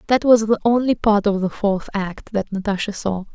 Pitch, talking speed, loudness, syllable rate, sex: 210 Hz, 215 wpm, -19 LUFS, 5.1 syllables/s, female